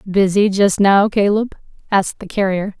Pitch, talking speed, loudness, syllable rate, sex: 200 Hz, 150 wpm, -16 LUFS, 4.8 syllables/s, female